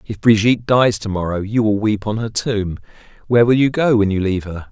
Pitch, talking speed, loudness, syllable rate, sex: 110 Hz, 240 wpm, -17 LUFS, 5.9 syllables/s, male